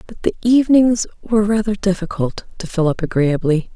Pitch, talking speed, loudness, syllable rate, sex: 195 Hz, 160 wpm, -17 LUFS, 5.6 syllables/s, female